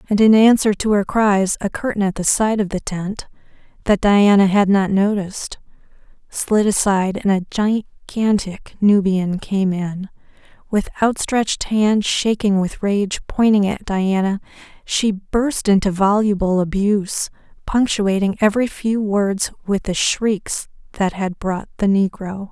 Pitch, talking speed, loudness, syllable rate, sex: 200 Hz, 140 wpm, -18 LUFS, 4.2 syllables/s, female